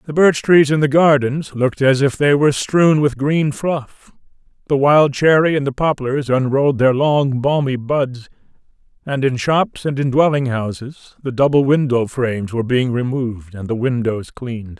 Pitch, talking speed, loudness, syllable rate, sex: 135 Hz, 175 wpm, -16 LUFS, 4.6 syllables/s, male